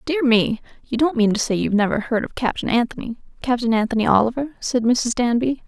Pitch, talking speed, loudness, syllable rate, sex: 240 Hz, 190 wpm, -20 LUFS, 6.0 syllables/s, female